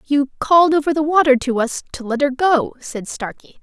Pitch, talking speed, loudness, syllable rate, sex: 280 Hz, 215 wpm, -17 LUFS, 5.1 syllables/s, female